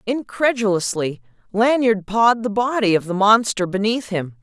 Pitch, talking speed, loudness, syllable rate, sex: 210 Hz, 135 wpm, -19 LUFS, 4.8 syllables/s, female